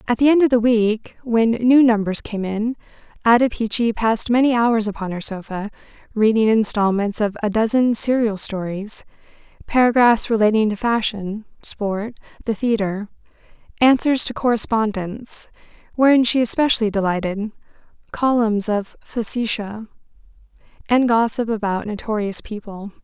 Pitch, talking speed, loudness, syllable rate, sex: 220 Hz, 125 wpm, -19 LUFS, 4.4 syllables/s, female